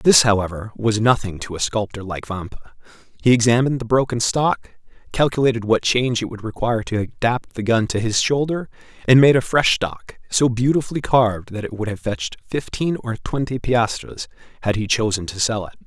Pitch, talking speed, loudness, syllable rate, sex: 115 Hz, 190 wpm, -20 LUFS, 5.4 syllables/s, male